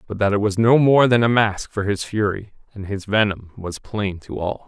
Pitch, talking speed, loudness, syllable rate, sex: 105 Hz, 245 wpm, -19 LUFS, 4.9 syllables/s, male